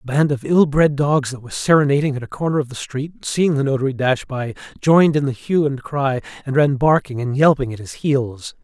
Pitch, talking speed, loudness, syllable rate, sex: 140 Hz, 235 wpm, -18 LUFS, 5.6 syllables/s, male